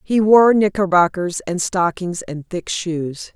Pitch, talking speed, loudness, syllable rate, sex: 180 Hz, 145 wpm, -18 LUFS, 3.8 syllables/s, female